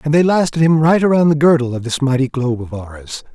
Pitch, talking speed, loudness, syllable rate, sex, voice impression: 140 Hz, 250 wpm, -15 LUFS, 5.7 syllables/s, male, very masculine, adult-like, slightly middle-aged, slightly thick, very tensed, slightly powerful, very bright, soft, very clear, very fluent, slightly raspy, slightly cool, intellectual, slightly refreshing, very sincere, slightly calm, slightly mature, very friendly, reassuring, unique, wild, very lively, intense, light